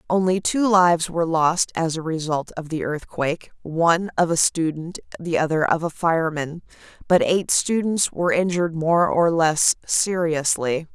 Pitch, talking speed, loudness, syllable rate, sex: 165 Hz, 160 wpm, -21 LUFS, 4.7 syllables/s, female